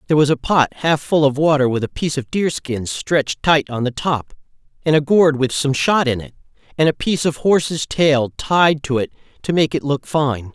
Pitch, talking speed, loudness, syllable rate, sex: 145 Hz, 235 wpm, -18 LUFS, 5.2 syllables/s, male